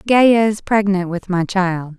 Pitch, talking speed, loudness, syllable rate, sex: 195 Hz, 180 wpm, -16 LUFS, 3.9 syllables/s, female